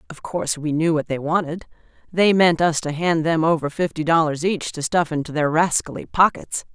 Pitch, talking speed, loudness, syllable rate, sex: 160 Hz, 205 wpm, -20 LUFS, 5.3 syllables/s, female